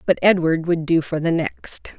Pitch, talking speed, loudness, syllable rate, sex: 165 Hz, 210 wpm, -20 LUFS, 4.6 syllables/s, female